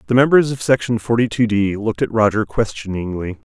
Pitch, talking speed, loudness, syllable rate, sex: 110 Hz, 190 wpm, -18 LUFS, 5.9 syllables/s, male